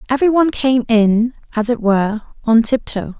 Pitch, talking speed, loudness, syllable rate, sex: 235 Hz, 170 wpm, -16 LUFS, 5.6 syllables/s, female